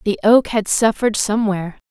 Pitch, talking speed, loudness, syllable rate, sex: 220 Hz, 155 wpm, -17 LUFS, 6.0 syllables/s, female